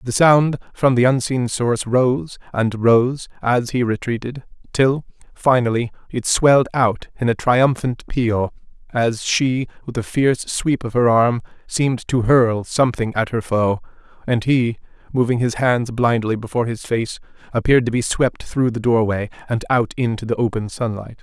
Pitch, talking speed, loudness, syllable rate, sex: 120 Hz, 165 wpm, -19 LUFS, 4.6 syllables/s, male